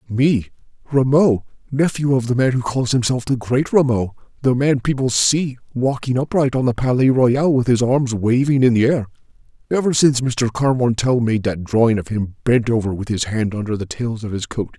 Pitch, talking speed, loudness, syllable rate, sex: 125 Hz, 200 wpm, -18 LUFS, 5.1 syllables/s, male